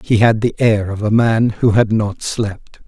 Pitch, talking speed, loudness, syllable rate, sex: 110 Hz, 230 wpm, -15 LUFS, 4.0 syllables/s, male